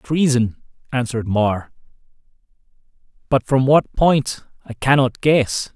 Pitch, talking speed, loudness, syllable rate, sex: 125 Hz, 105 wpm, -18 LUFS, 3.8 syllables/s, male